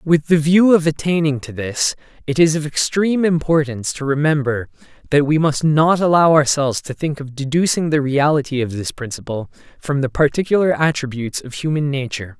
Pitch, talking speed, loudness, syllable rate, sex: 150 Hz, 175 wpm, -17 LUFS, 5.6 syllables/s, male